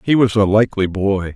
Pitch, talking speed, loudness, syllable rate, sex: 100 Hz, 220 wpm, -16 LUFS, 5.6 syllables/s, male